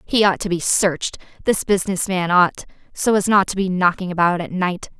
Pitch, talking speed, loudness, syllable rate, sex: 185 Hz, 215 wpm, -19 LUFS, 5.6 syllables/s, female